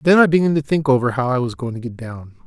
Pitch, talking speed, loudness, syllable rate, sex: 135 Hz, 315 wpm, -18 LUFS, 6.7 syllables/s, male